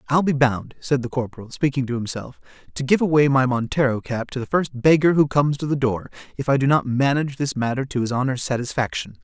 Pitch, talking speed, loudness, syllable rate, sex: 130 Hz, 225 wpm, -21 LUFS, 6.1 syllables/s, male